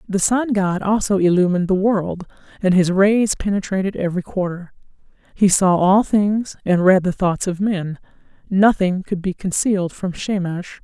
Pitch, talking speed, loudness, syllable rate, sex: 190 Hz, 160 wpm, -18 LUFS, 4.7 syllables/s, female